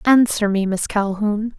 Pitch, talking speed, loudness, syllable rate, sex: 210 Hz, 150 wpm, -19 LUFS, 4.0 syllables/s, female